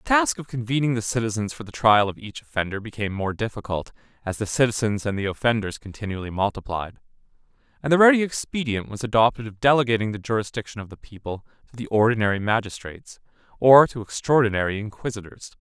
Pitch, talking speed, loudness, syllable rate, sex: 115 Hz, 170 wpm, -23 LUFS, 6.4 syllables/s, male